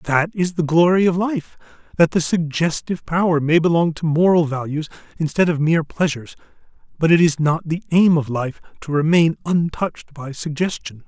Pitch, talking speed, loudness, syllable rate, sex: 160 Hz, 175 wpm, -19 LUFS, 5.3 syllables/s, male